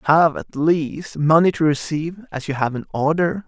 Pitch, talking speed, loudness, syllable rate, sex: 160 Hz, 205 wpm, -20 LUFS, 5.0 syllables/s, male